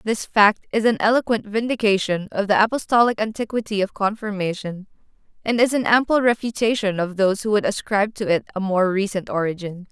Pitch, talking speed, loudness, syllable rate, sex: 210 Hz, 170 wpm, -20 LUFS, 5.8 syllables/s, female